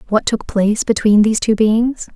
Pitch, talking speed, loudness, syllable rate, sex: 220 Hz, 195 wpm, -15 LUFS, 5.2 syllables/s, female